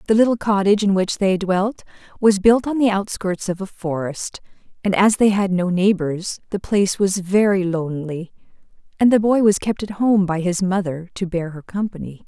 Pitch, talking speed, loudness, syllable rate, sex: 195 Hz, 195 wpm, -19 LUFS, 5.1 syllables/s, female